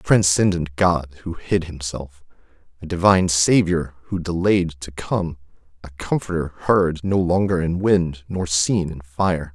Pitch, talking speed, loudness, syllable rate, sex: 85 Hz, 150 wpm, -20 LUFS, 4.2 syllables/s, male